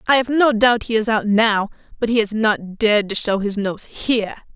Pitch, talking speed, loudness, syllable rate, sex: 220 Hz, 235 wpm, -18 LUFS, 5.2 syllables/s, female